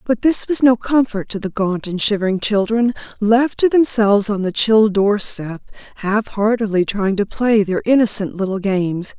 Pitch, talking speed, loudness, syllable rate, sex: 210 Hz, 185 wpm, -17 LUFS, 4.7 syllables/s, female